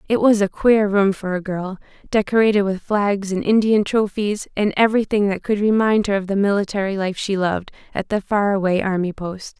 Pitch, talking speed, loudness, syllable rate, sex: 200 Hz, 200 wpm, -19 LUFS, 5.4 syllables/s, female